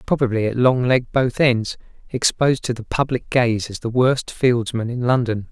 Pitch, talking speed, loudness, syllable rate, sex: 120 Hz, 185 wpm, -19 LUFS, 4.8 syllables/s, male